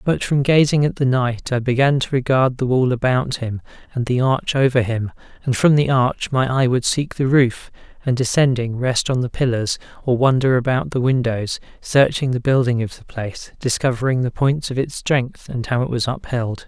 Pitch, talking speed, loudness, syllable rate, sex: 130 Hz, 205 wpm, -19 LUFS, 5.0 syllables/s, male